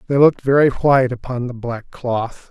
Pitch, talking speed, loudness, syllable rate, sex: 125 Hz, 190 wpm, -18 LUFS, 5.2 syllables/s, male